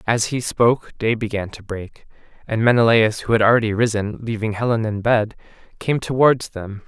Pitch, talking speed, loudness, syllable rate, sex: 110 Hz, 175 wpm, -19 LUFS, 5.1 syllables/s, male